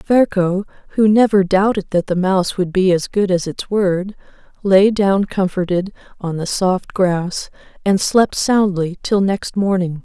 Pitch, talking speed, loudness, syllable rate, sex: 190 Hz, 160 wpm, -17 LUFS, 4.1 syllables/s, female